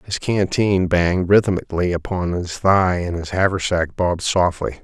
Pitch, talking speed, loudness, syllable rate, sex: 90 Hz, 150 wpm, -19 LUFS, 4.7 syllables/s, male